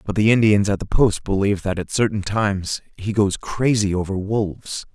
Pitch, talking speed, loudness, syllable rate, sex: 100 Hz, 195 wpm, -20 LUFS, 5.2 syllables/s, male